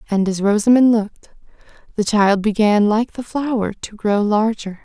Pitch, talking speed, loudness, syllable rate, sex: 215 Hz, 160 wpm, -17 LUFS, 4.7 syllables/s, female